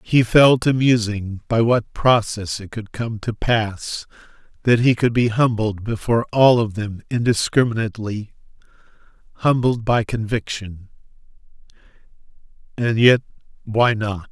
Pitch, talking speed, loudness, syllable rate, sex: 115 Hz, 115 wpm, -19 LUFS, 4.3 syllables/s, male